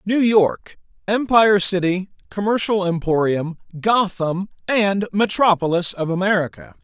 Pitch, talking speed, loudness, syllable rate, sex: 195 Hz, 95 wpm, -19 LUFS, 4.4 syllables/s, male